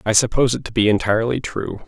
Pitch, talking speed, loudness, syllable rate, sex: 110 Hz, 225 wpm, -19 LUFS, 6.9 syllables/s, male